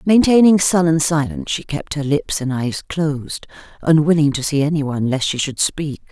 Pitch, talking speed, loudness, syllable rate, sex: 155 Hz, 175 wpm, -17 LUFS, 5.1 syllables/s, female